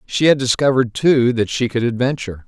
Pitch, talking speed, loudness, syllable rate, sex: 125 Hz, 195 wpm, -17 LUFS, 6.0 syllables/s, male